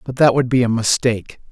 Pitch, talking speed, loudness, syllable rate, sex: 125 Hz, 240 wpm, -16 LUFS, 6.0 syllables/s, male